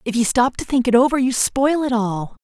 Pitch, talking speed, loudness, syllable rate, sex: 245 Hz, 270 wpm, -18 LUFS, 5.2 syllables/s, female